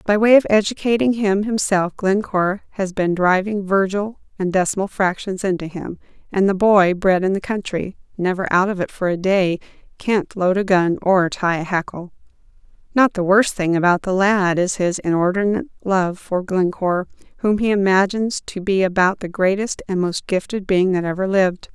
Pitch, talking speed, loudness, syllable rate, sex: 190 Hz, 175 wpm, -19 LUFS, 5.1 syllables/s, female